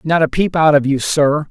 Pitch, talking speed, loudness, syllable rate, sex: 150 Hz, 280 wpm, -14 LUFS, 5.0 syllables/s, male